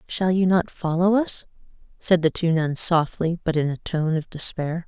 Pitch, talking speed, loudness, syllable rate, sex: 170 Hz, 195 wpm, -22 LUFS, 4.6 syllables/s, female